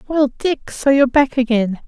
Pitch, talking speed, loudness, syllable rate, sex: 260 Hz, 190 wpm, -16 LUFS, 5.0 syllables/s, female